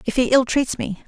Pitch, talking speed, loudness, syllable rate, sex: 250 Hz, 280 wpm, -19 LUFS, 5.8 syllables/s, female